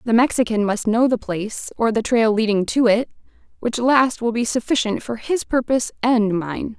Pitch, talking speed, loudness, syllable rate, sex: 230 Hz, 195 wpm, -19 LUFS, 5.0 syllables/s, female